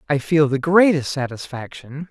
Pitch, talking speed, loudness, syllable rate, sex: 150 Hz, 140 wpm, -18 LUFS, 4.7 syllables/s, male